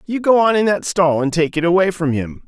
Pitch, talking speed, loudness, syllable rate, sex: 175 Hz, 290 wpm, -16 LUFS, 5.6 syllables/s, male